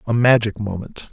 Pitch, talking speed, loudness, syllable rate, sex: 110 Hz, 160 wpm, -18 LUFS, 5.2 syllables/s, male